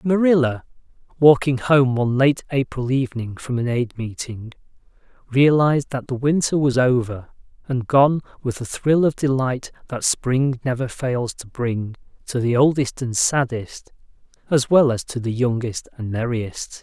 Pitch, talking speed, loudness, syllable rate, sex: 130 Hz, 155 wpm, -20 LUFS, 4.4 syllables/s, male